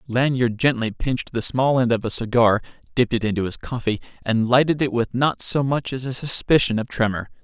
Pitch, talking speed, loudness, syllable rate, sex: 120 Hz, 210 wpm, -21 LUFS, 5.6 syllables/s, male